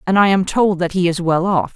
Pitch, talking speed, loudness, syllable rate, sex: 185 Hz, 305 wpm, -16 LUFS, 5.6 syllables/s, female